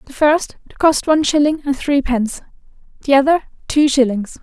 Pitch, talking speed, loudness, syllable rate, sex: 280 Hz, 165 wpm, -16 LUFS, 5.6 syllables/s, female